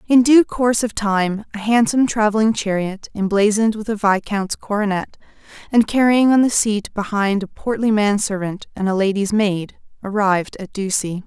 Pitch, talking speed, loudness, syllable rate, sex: 210 Hz, 165 wpm, -18 LUFS, 5.0 syllables/s, female